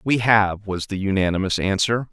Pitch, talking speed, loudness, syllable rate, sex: 100 Hz, 170 wpm, -20 LUFS, 5.0 syllables/s, male